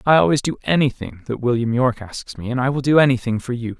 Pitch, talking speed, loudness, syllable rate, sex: 125 Hz, 255 wpm, -19 LUFS, 6.5 syllables/s, male